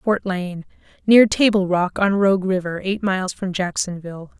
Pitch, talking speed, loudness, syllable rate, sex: 190 Hz, 150 wpm, -19 LUFS, 4.9 syllables/s, female